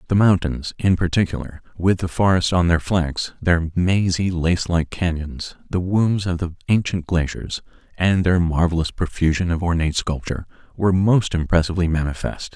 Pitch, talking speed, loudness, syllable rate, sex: 85 Hz, 150 wpm, -20 LUFS, 5.2 syllables/s, male